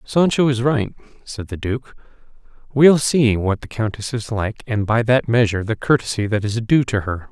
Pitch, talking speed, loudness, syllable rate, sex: 115 Hz, 195 wpm, -19 LUFS, 4.9 syllables/s, male